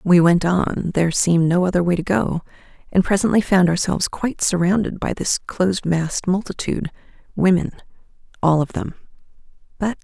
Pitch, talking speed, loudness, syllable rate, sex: 180 Hz, 145 wpm, -19 LUFS, 5.5 syllables/s, female